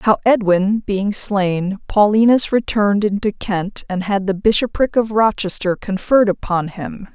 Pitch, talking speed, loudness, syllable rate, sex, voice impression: 205 Hz, 145 wpm, -17 LUFS, 4.4 syllables/s, female, feminine, middle-aged, tensed, powerful, slightly bright, slightly soft, slightly muffled, intellectual, calm, friendly, reassuring, elegant, slightly lively, kind, slightly modest